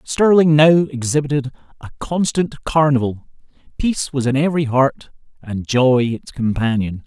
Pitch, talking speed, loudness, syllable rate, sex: 135 Hz, 125 wpm, -17 LUFS, 4.7 syllables/s, male